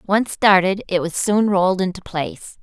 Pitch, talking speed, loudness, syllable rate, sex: 190 Hz, 185 wpm, -18 LUFS, 4.7 syllables/s, female